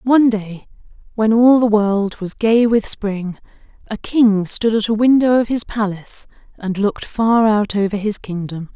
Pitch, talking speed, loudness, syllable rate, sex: 215 Hz, 180 wpm, -16 LUFS, 4.5 syllables/s, female